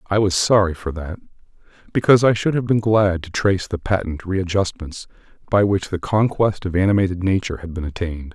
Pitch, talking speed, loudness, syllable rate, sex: 95 Hz, 185 wpm, -19 LUFS, 5.8 syllables/s, male